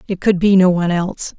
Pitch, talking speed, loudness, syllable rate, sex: 185 Hz, 260 wpm, -15 LUFS, 6.6 syllables/s, female